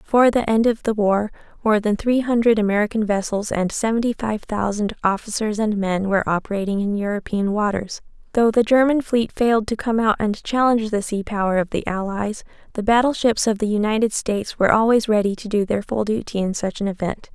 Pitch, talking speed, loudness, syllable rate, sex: 215 Hz, 200 wpm, -20 LUFS, 5.8 syllables/s, female